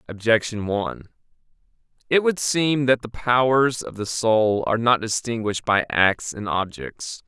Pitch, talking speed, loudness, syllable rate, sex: 115 Hz, 150 wpm, -21 LUFS, 4.4 syllables/s, male